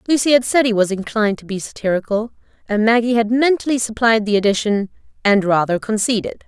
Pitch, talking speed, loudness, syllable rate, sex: 220 Hz, 175 wpm, -17 LUFS, 6.1 syllables/s, female